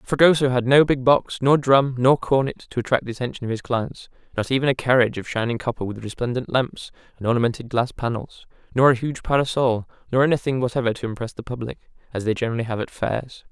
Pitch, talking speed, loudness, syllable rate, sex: 125 Hz, 205 wpm, -22 LUFS, 6.4 syllables/s, male